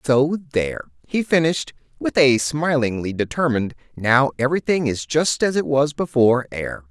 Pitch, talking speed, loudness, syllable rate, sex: 135 Hz, 150 wpm, -20 LUFS, 5.2 syllables/s, male